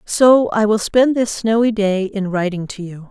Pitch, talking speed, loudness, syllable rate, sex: 210 Hz, 210 wpm, -16 LUFS, 4.4 syllables/s, female